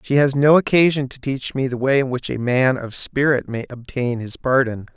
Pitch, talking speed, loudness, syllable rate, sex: 130 Hz, 230 wpm, -19 LUFS, 5.0 syllables/s, male